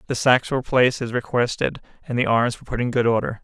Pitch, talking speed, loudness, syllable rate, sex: 120 Hz, 245 wpm, -21 LUFS, 7.0 syllables/s, male